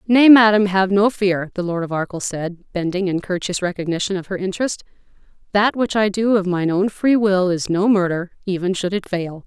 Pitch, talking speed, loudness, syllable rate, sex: 190 Hz, 210 wpm, -18 LUFS, 5.3 syllables/s, female